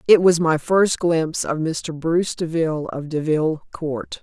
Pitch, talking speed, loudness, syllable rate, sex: 160 Hz, 170 wpm, -20 LUFS, 4.6 syllables/s, female